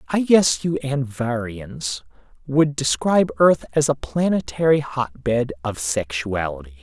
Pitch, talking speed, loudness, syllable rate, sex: 125 Hz, 115 wpm, -21 LUFS, 4.1 syllables/s, male